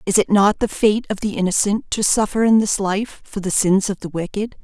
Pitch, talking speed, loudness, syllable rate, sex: 200 Hz, 245 wpm, -18 LUFS, 5.2 syllables/s, female